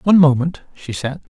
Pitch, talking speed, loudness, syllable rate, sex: 145 Hz, 180 wpm, -17 LUFS, 5.6 syllables/s, male